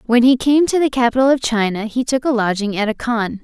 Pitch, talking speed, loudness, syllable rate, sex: 240 Hz, 260 wpm, -16 LUFS, 5.8 syllables/s, female